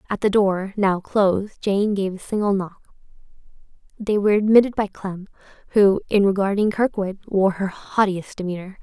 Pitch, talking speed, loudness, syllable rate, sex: 200 Hz, 155 wpm, -20 LUFS, 5.0 syllables/s, female